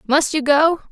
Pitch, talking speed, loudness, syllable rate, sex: 295 Hz, 200 wpm, -16 LUFS, 4.4 syllables/s, female